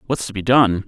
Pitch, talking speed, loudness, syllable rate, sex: 110 Hz, 275 wpm, -17 LUFS, 5.6 syllables/s, male